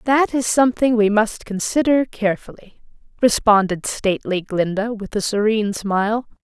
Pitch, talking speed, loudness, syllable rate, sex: 220 Hz, 130 wpm, -19 LUFS, 5.0 syllables/s, female